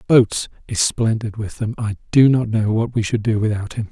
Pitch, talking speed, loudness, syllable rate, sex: 110 Hz, 215 wpm, -19 LUFS, 5.4 syllables/s, male